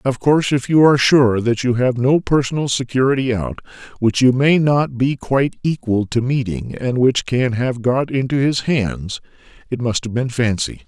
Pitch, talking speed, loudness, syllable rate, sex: 125 Hz, 195 wpm, -17 LUFS, 4.8 syllables/s, male